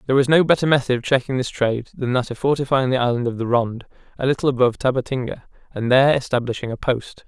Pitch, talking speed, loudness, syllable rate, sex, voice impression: 130 Hz, 225 wpm, -20 LUFS, 7.1 syllables/s, male, very masculine, adult-like, slightly middle-aged, thick, slightly tensed, slightly weak, very bright, soft, slightly muffled, fluent, slightly raspy, very cool, very intellectual, very sincere, very calm, mature, very friendly, very reassuring, unique, very elegant, slightly wild, very sweet, very kind, very modest